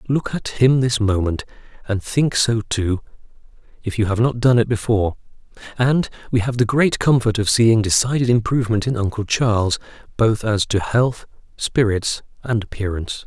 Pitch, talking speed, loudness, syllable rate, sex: 115 Hz, 165 wpm, -19 LUFS, 5.0 syllables/s, male